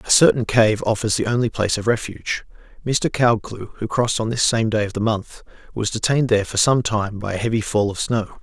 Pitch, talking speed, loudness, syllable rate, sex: 110 Hz, 230 wpm, -20 LUFS, 5.8 syllables/s, male